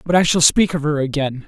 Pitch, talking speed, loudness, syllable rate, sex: 155 Hz, 285 wpm, -17 LUFS, 5.9 syllables/s, male